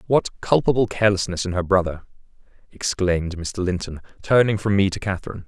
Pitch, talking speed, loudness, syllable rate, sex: 95 Hz, 155 wpm, -21 LUFS, 6.3 syllables/s, male